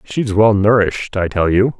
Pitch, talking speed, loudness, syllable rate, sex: 105 Hz, 200 wpm, -15 LUFS, 4.7 syllables/s, male